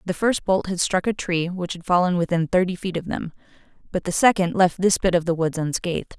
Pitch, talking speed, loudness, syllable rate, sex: 180 Hz, 245 wpm, -22 LUFS, 5.7 syllables/s, female